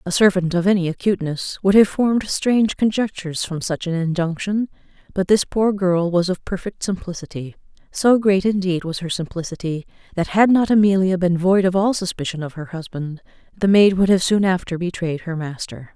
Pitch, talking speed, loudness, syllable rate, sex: 185 Hz, 185 wpm, -19 LUFS, 5.4 syllables/s, female